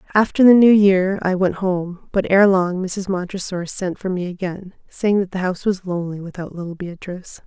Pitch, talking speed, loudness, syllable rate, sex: 185 Hz, 200 wpm, -19 LUFS, 5.3 syllables/s, female